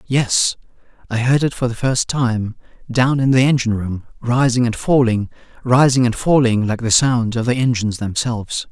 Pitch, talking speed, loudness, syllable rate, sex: 120 Hz, 170 wpm, -17 LUFS, 5.0 syllables/s, male